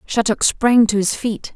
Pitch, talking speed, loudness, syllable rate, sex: 220 Hz, 195 wpm, -17 LUFS, 4.2 syllables/s, female